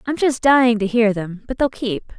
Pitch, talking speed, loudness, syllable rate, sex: 230 Hz, 245 wpm, -18 LUFS, 5.0 syllables/s, female